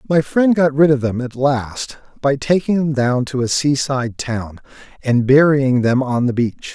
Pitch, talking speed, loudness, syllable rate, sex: 135 Hz, 205 wpm, -17 LUFS, 4.2 syllables/s, male